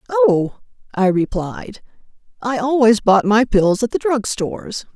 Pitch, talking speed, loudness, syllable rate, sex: 215 Hz, 145 wpm, -17 LUFS, 4.0 syllables/s, female